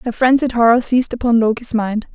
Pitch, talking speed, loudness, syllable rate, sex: 235 Hz, 195 wpm, -15 LUFS, 5.9 syllables/s, female